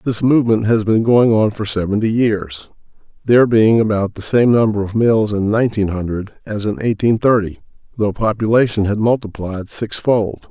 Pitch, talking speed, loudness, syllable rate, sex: 110 Hz, 170 wpm, -16 LUFS, 5.1 syllables/s, male